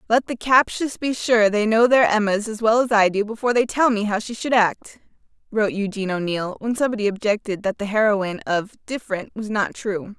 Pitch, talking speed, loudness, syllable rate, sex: 215 Hz, 210 wpm, -21 LUFS, 5.5 syllables/s, female